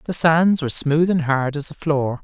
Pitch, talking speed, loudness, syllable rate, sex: 155 Hz, 240 wpm, -19 LUFS, 4.8 syllables/s, male